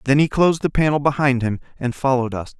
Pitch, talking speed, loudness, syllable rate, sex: 135 Hz, 230 wpm, -19 LUFS, 6.6 syllables/s, male